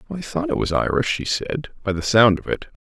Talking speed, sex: 255 wpm, male